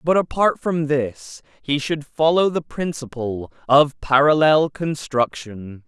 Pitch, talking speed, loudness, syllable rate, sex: 145 Hz, 125 wpm, -19 LUFS, 3.7 syllables/s, male